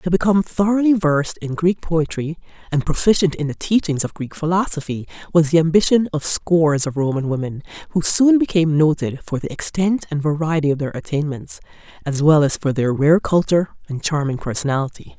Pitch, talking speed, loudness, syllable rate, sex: 160 Hz, 180 wpm, -19 LUFS, 5.7 syllables/s, female